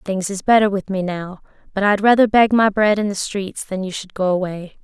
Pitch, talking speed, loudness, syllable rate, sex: 200 Hz, 250 wpm, -18 LUFS, 5.2 syllables/s, female